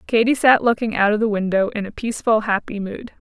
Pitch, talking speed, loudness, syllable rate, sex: 215 Hz, 215 wpm, -19 LUFS, 5.9 syllables/s, female